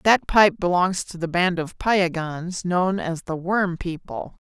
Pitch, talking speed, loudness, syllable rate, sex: 180 Hz, 175 wpm, -22 LUFS, 3.9 syllables/s, female